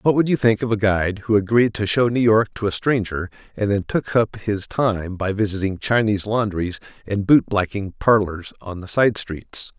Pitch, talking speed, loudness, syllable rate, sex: 105 Hz, 210 wpm, -20 LUFS, 4.9 syllables/s, male